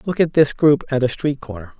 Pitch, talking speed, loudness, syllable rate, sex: 140 Hz, 270 wpm, -18 LUFS, 5.6 syllables/s, male